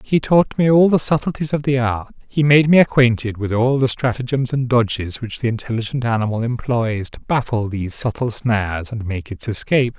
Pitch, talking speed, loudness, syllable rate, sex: 120 Hz, 200 wpm, -18 LUFS, 5.3 syllables/s, male